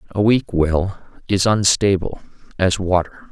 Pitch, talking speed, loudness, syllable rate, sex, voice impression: 95 Hz, 125 wpm, -18 LUFS, 4.0 syllables/s, male, masculine, adult-like, slightly dark, calm, unique